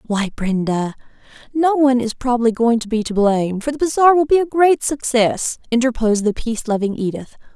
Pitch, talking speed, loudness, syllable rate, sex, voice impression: 240 Hz, 190 wpm, -17 LUFS, 5.7 syllables/s, female, very feminine, slightly young, slightly adult-like, thin, slightly tensed, slightly weak, slightly bright, slightly hard, clear, fluent, slightly raspy, slightly cool, slightly intellectual, refreshing, sincere, calm, friendly, reassuring, slightly unique, slightly wild, slightly sweet, slightly strict, slightly intense